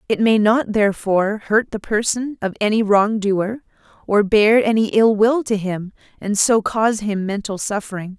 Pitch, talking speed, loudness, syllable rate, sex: 210 Hz, 175 wpm, -18 LUFS, 4.7 syllables/s, female